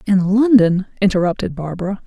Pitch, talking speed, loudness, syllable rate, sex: 195 Hz, 115 wpm, -16 LUFS, 5.6 syllables/s, female